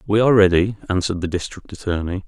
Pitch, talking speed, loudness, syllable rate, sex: 95 Hz, 185 wpm, -19 LUFS, 7.0 syllables/s, male